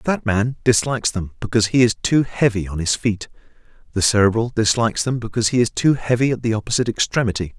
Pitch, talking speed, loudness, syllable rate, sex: 115 Hz, 205 wpm, -19 LUFS, 6.7 syllables/s, male